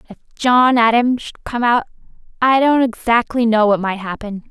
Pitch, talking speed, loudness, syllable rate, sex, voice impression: 235 Hz, 175 wpm, -16 LUFS, 4.9 syllables/s, female, very feminine, young, tensed, slightly powerful, very bright, soft, very clear, slightly fluent, very cute, intellectual, refreshing, very sincere, very calm, very friendly, very reassuring, very unique, very elegant, slightly wild, very sweet, very lively, very kind, very modest, light